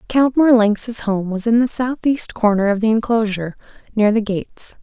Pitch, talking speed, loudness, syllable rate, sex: 225 Hz, 175 wpm, -17 LUFS, 4.9 syllables/s, female